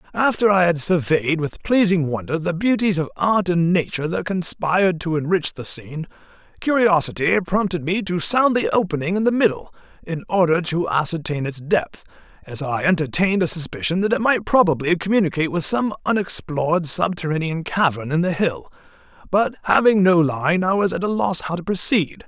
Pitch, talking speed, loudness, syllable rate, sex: 175 Hz, 175 wpm, -20 LUFS, 5.4 syllables/s, male